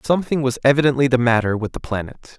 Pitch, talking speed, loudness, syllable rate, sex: 130 Hz, 200 wpm, -18 LUFS, 6.7 syllables/s, male